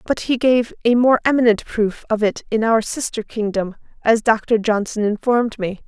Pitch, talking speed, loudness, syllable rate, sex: 225 Hz, 185 wpm, -18 LUFS, 4.8 syllables/s, female